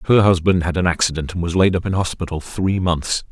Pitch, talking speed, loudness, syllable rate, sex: 90 Hz, 235 wpm, -19 LUFS, 5.8 syllables/s, male